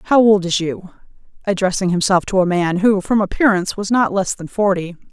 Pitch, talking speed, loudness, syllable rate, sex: 195 Hz, 200 wpm, -17 LUFS, 5.6 syllables/s, female